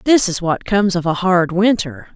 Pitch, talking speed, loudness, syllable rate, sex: 190 Hz, 225 wpm, -16 LUFS, 5.0 syllables/s, female